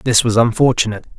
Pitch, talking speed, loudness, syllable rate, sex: 115 Hz, 150 wpm, -15 LUFS, 6.6 syllables/s, male